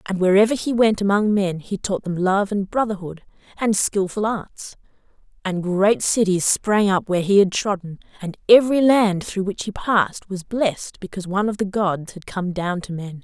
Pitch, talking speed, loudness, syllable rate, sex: 195 Hz, 195 wpm, -20 LUFS, 5.0 syllables/s, female